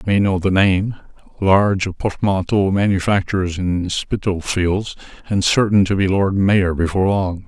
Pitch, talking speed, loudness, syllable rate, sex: 95 Hz, 135 wpm, -18 LUFS, 4.6 syllables/s, male